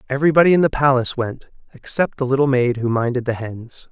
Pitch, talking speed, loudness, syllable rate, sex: 130 Hz, 200 wpm, -18 LUFS, 6.3 syllables/s, male